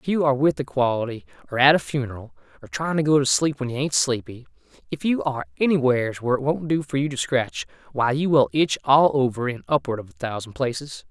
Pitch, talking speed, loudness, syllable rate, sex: 135 Hz, 240 wpm, -22 LUFS, 6.2 syllables/s, male